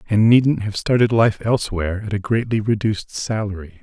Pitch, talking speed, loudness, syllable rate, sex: 105 Hz, 175 wpm, -19 LUFS, 5.7 syllables/s, male